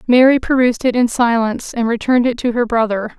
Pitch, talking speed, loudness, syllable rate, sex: 240 Hz, 205 wpm, -15 LUFS, 6.3 syllables/s, female